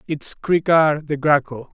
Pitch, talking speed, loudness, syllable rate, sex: 150 Hz, 135 wpm, -18 LUFS, 3.9 syllables/s, male